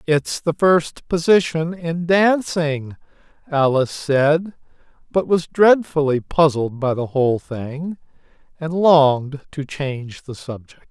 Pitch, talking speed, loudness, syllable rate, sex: 150 Hz, 120 wpm, -18 LUFS, 3.8 syllables/s, male